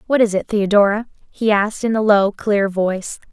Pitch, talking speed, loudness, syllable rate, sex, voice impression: 205 Hz, 200 wpm, -17 LUFS, 5.3 syllables/s, female, feminine, slightly adult-like, slightly clear, sincere, slightly lively